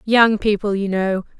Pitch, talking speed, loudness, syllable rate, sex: 205 Hz, 170 wpm, -18 LUFS, 4.2 syllables/s, female